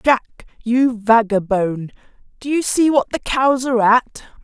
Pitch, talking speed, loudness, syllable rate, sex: 240 Hz, 150 wpm, -17 LUFS, 4.2 syllables/s, female